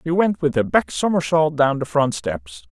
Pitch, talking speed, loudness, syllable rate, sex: 135 Hz, 220 wpm, -19 LUFS, 4.7 syllables/s, male